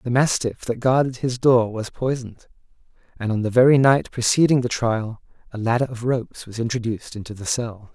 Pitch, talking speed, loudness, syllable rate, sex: 120 Hz, 190 wpm, -21 LUFS, 5.6 syllables/s, male